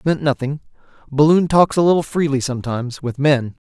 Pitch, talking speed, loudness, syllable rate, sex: 145 Hz, 180 wpm, -17 LUFS, 6.1 syllables/s, male